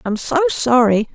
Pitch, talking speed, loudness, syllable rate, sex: 260 Hz, 155 wpm, -16 LUFS, 4.5 syllables/s, female